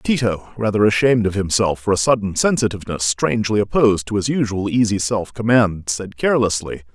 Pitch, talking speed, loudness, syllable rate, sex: 105 Hz, 165 wpm, -18 LUFS, 5.9 syllables/s, male